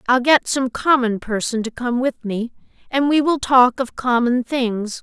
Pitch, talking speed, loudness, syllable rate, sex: 245 Hz, 190 wpm, -18 LUFS, 4.2 syllables/s, female